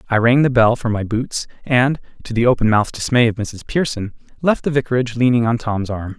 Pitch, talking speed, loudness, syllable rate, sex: 120 Hz, 225 wpm, -18 LUFS, 5.8 syllables/s, male